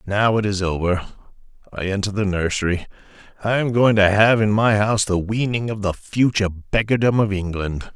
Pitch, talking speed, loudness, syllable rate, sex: 100 Hz, 180 wpm, -20 LUFS, 5.6 syllables/s, male